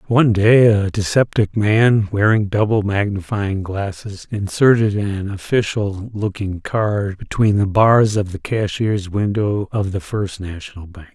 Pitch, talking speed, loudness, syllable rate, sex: 100 Hz, 140 wpm, -18 LUFS, 4.1 syllables/s, male